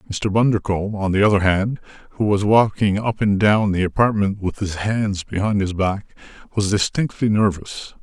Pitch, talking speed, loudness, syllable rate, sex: 100 Hz, 170 wpm, -19 LUFS, 5.0 syllables/s, male